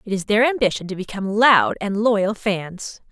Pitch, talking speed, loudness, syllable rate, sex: 205 Hz, 190 wpm, -19 LUFS, 4.8 syllables/s, female